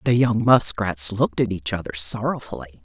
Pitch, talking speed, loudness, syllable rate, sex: 100 Hz, 170 wpm, -20 LUFS, 5.2 syllables/s, female